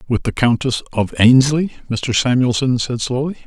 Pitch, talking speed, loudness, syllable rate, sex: 125 Hz, 155 wpm, -16 LUFS, 5.2 syllables/s, male